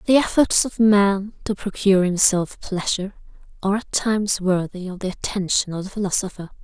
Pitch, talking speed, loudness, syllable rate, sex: 195 Hz, 165 wpm, -20 LUFS, 5.5 syllables/s, female